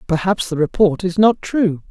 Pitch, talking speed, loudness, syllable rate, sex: 180 Hz, 190 wpm, -17 LUFS, 4.7 syllables/s, female